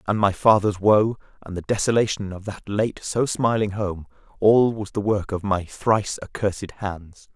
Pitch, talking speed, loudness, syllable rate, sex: 100 Hz, 180 wpm, -22 LUFS, 4.7 syllables/s, male